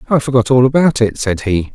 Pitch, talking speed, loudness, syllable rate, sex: 120 Hz, 240 wpm, -14 LUFS, 5.8 syllables/s, male